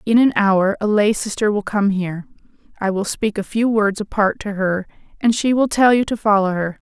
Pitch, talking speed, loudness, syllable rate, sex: 205 Hz, 225 wpm, -18 LUFS, 5.2 syllables/s, female